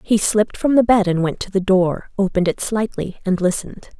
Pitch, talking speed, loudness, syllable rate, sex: 200 Hz, 225 wpm, -18 LUFS, 5.7 syllables/s, female